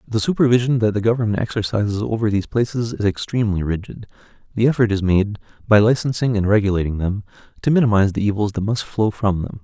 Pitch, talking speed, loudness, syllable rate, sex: 105 Hz, 185 wpm, -19 LUFS, 6.6 syllables/s, male